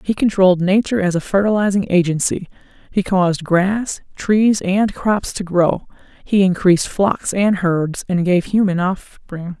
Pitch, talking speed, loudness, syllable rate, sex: 190 Hz, 150 wpm, -17 LUFS, 4.5 syllables/s, female